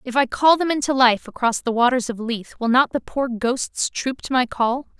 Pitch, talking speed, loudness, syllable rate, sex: 250 Hz, 240 wpm, -20 LUFS, 5.0 syllables/s, female